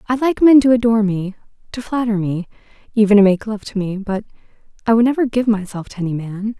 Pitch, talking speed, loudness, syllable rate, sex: 215 Hz, 190 wpm, -17 LUFS, 6.2 syllables/s, female